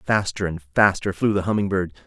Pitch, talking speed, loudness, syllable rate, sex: 95 Hz, 205 wpm, -22 LUFS, 5.6 syllables/s, male